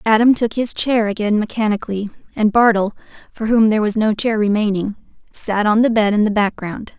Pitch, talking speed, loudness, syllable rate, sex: 215 Hz, 190 wpm, -17 LUFS, 5.6 syllables/s, female